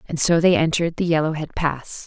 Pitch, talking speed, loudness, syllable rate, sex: 160 Hz, 205 wpm, -20 LUFS, 6.0 syllables/s, female